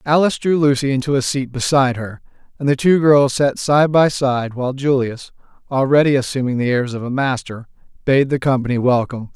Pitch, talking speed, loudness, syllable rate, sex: 135 Hz, 185 wpm, -17 LUFS, 5.7 syllables/s, male